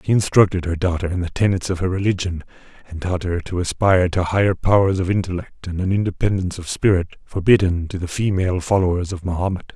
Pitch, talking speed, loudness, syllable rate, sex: 90 Hz, 195 wpm, -20 LUFS, 6.3 syllables/s, male